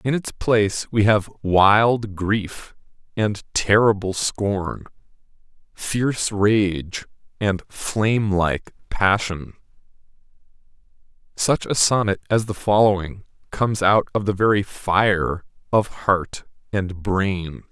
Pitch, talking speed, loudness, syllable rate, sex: 100 Hz, 110 wpm, -20 LUFS, 3.3 syllables/s, male